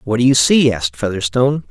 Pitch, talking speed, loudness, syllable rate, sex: 125 Hz, 210 wpm, -15 LUFS, 6.4 syllables/s, male